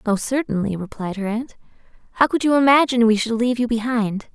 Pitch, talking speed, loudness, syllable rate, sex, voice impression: 235 Hz, 195 wpm, -19 LUFS, 6.1 syllables/s, female, feminine, slightly young, slightly weak, slightly halting, slightly cute, slightly kind, slightly modest